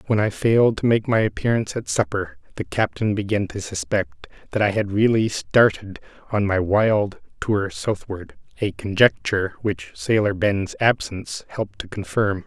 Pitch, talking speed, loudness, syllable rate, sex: 105 Hz, 155 wpm, -21 LUFS, 4.7 syllables/s, male